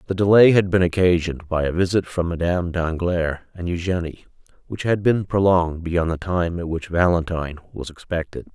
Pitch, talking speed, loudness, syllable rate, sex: 85 Hz, 175 wpm, -20 LUFS, 5.6 syllables/s, male